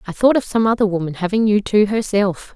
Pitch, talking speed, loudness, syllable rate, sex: 205 Hz, 235 wpm, -17 LUFS, 5.9 syllables/s, female